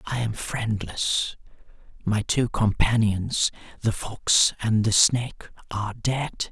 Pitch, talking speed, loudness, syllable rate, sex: 110 Hz, 120 wpm, -24 LUFS, 3.6 syllables/s, male